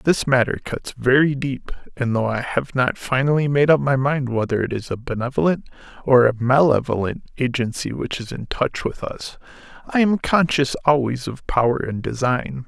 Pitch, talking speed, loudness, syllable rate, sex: 130 Hz, 180 wpm, -20 LUFS, 4.9 syllables/s, male